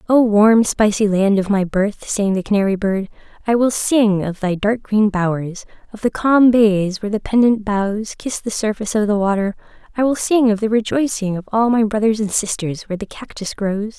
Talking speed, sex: 225 wpm, female